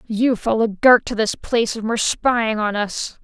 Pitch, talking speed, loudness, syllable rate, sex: 225 Hz, 205 wpm, -19 LUFS, 5.0 syllables/s, female